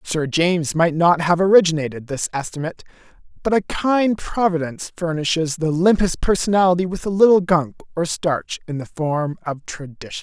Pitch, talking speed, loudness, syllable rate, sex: 170 Hz, 160 wpm, -19 LUFS, 5.3 syllables/s, male